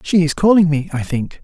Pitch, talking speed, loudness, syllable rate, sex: 160 Hz, 250 wpm, -16 LUFS, 5.4 syllables/s, male